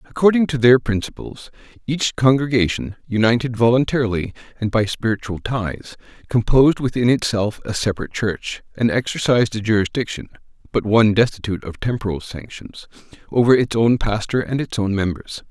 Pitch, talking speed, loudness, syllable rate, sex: 115 Hz, 140 wpm, -19 LUFS, 5.6 syllables/s, male